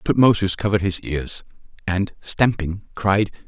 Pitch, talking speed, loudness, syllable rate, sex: 95 Hz, 120 wpm, -21 LUFS, 4.4 syllables/s, male